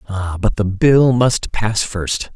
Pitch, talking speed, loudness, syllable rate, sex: 105 Hz, 180 wpm, -16 LUFS, 3.3 syllables/s, male